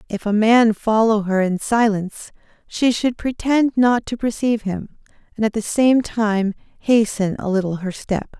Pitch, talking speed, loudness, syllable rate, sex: 220 Hz, 170 wpm, -19 LUFS, 4.4 syllables/s, female